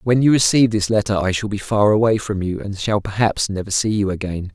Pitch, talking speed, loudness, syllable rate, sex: 105 Hz, 250 wpm, -18 LUFS, 5.8 syllables/s, male